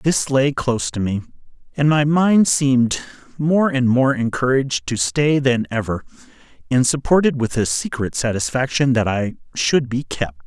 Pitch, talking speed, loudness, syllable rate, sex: 130 Hz, 160 wpm, -18 LUFS, 4.7 syllables/s, male